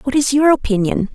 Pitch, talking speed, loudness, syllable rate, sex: 255 Hz, 210 wpm, -15 LUFS, 5.8 syllables/s, female